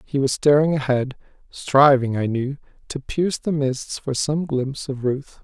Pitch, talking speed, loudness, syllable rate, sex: 140 Hz, 175 wpm, -21 LUFS, 4.5 syllables/s, male